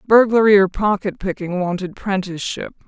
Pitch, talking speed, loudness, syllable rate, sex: 195 Hz, 125 wpm, -18 LUFS, 5.5 syllables/s, female